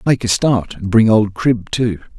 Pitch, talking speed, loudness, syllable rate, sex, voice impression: 110 Hz, 220 wpm, -15 LUFS, 4.2 syllables/s, male, masculine, middle-aged, tensed, slightly dark, slightly raspy, sincere, calm, mature, wild, kind, modest